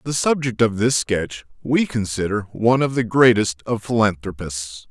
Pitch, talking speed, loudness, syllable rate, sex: 115 Hz, 160 wpm, -20 LUFS, 4.6 syllables/s, male